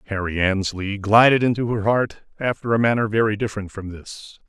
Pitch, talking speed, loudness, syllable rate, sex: 105 Hz, 175 wpm, -20 LUFS, 5.6 syllables/s, male